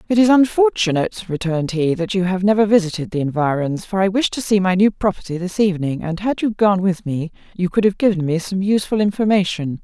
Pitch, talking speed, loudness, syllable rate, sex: 190 Hz, 220 wpm, -18 LUFS, 6.0 syllables/s, female